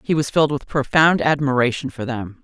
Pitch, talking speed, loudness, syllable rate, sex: 135 Hz, 195 wpm, -19 LUFS, 5.6 syllables/s, female